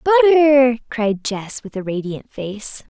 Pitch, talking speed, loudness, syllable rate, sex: 235 Hz, 140 wpm, -18 LUFS, 4.5 syllables/s, female